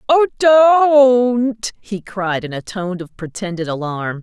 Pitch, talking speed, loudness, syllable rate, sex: 210 Hz, 140 wpm, -16 LUFS, 3.4 syllables/s, female